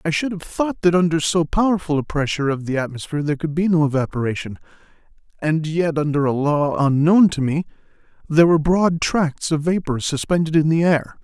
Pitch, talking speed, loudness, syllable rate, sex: 160 Hz, 190 wpm, -19 LUFS, 5.8 syllables/s, male